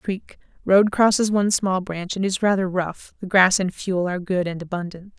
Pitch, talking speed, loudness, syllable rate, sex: 190 Hz, 195 wpm, -21 LUFS, 5.1 syllables/s, female